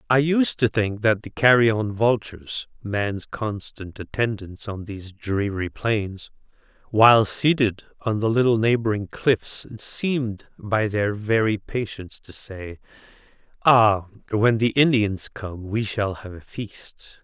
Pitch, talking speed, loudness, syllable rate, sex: 110 Hz, 135 wpm, -22 LUFS, 3.8 syllables/s, male